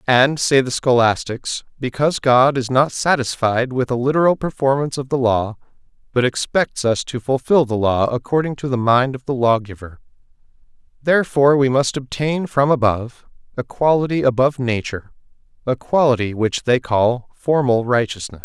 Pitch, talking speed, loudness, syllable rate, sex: 130 Hz, 155 wpm, -18 LUFS, 5.2 syllables/s, male